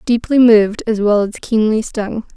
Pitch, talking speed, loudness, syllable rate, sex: 220 Hz, 180 wpm, -14 LUFS, 4.9 syllables/s, female